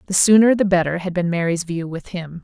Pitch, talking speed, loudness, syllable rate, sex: 180 Hz, 245 wpm, -18 LUFS, 5.8 syllables/s, female